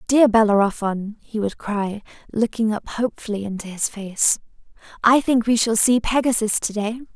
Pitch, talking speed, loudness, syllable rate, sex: 220 Hz, 160 wpm, -20 LUFS, 4.9 syllables/s, female